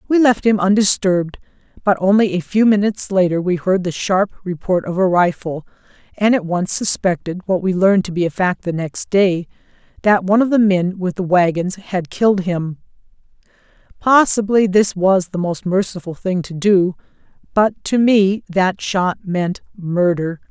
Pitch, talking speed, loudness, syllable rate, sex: 190 Hz, 175 wpm, -17 LUFS, 4.7 syllables/s, female